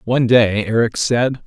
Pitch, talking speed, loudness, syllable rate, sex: 115 Hz, 165 wpm, -16 LUFS, 4.6 syllables/s, male